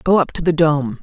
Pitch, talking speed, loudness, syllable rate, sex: 160 Hz, 290 wpm, -16 LUFS, 6.2 syllables/s, female